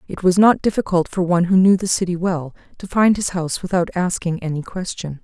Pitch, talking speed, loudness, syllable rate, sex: 180 Hz, 220 wpm, -18 LUFS, 5.8 syllables/s, female